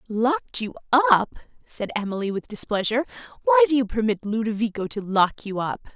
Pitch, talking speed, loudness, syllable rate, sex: 235 Hz, 160 wpm, -23 LUFS, 5.6 syllables/s, female